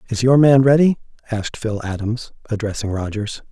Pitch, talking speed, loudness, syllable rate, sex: 115 Hz, 155 wpm, -18 LUFS, 5.4 syllables/s, male